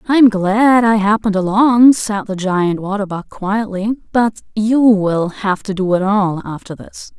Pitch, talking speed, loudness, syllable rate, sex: 205 Hz, 175 wpm, -15 LUFS, 4.1 syllables/s, female